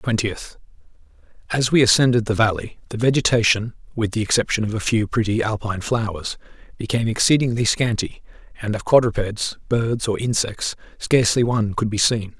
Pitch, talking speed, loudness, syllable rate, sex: 110 Hz, 145 wpm, -20 LUFS, 5.6 syllables/s, male